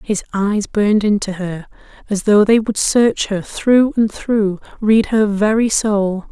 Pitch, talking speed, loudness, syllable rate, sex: 210 Hz, 170 wpm, -16 LUFS, 3.8 syllables/s, female